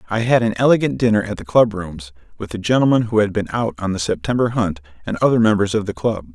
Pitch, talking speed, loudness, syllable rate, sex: 105 Hz, 245 wpm, -18 LUFS, 6.4 syllables/s, male